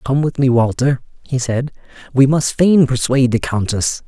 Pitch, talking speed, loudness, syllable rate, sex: 130 Hz, 175 wpm, -16 LUFS, 4.8 syllables/s, male